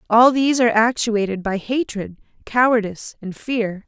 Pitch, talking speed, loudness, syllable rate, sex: 225 Hz, 140 wpm, -19 LUFS, 5.1 syllables/s, female